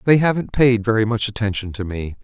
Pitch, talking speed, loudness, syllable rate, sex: 115 Hz, 215 wpm, -19 LUFS, 5.9 syllables/s, male